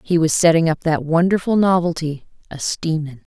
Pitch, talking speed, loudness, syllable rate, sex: 165 Hz, 160 wpm, -18 LUFS, 5.8 syllables/s, female